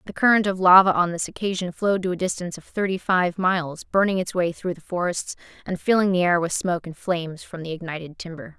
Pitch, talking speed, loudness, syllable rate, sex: 180 Hz, 230 wpm, -22 LUFS, 6.2 syllables/s, female